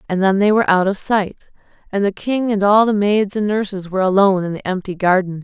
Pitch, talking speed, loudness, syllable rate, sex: 200 Hz, 245 wpm, -17 LUFS, 6.0 syllables/s, female